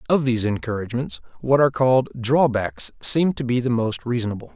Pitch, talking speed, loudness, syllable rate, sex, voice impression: 125 Hz, 170 wpm, -21 LUFS, 6.0 syllables/s, male, very masculine, very adult-like, thick, tensed, very powerful, slightly bright, hard, very clear, fluent, raspy, cool, intellectual, very refreshing, sincere, calm, mature, friendly, very reassuring, unique, elegant, wild, slightly sweet, lively, strict, slightly intense